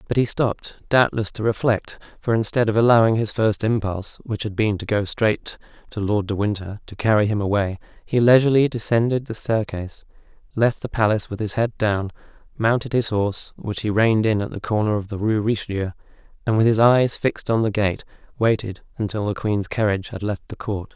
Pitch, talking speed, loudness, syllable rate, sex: 110 Hz, 200 wpm, -21 LUFS, 5.7 syllables/s, male